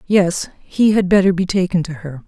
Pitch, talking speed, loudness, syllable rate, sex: 180 Hz, 210 wpm, -16 LUFS, 4.8 syllables/s, female